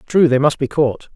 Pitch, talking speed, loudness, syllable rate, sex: 145 Hz, 260 wpm, -16 LUFS, 5.1 syllables/s, male